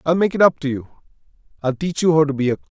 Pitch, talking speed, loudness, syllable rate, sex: 155 Hz, 280 wpm, -19 LUFS, 7.7 syllables/s, male